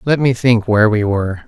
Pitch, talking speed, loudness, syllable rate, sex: 115 Hz, 245 wpm, -14 LUFS, 6.0 syllables/s, male